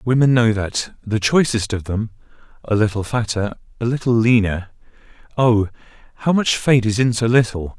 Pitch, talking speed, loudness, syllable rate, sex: 115 Hz, 160 wpm, -18 LUFS, 5.0 syllables/s, male